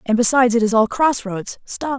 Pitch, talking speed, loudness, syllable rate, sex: 235 Hz, 240 wpm, -17 LUFS, 5.3 syllables/s, female